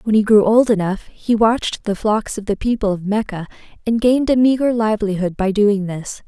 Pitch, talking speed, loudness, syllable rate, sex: 215 Hz, 210 wpm, -17 LUFS, 5.4 syllables/s, female